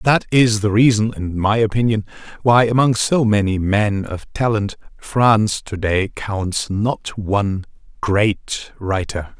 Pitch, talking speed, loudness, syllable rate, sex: 105 Hz, 140 wpm, -18 LUFS, 3.7 syllables/s, male